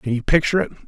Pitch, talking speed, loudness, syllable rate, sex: 145 Hz, 275 wpm, -19 LUFS, 8.6 syllables/s, male